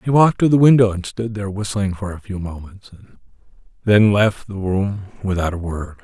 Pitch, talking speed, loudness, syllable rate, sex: 100 Hz, 210 wpm, -18 LUFS, 5.6 syllables/s, male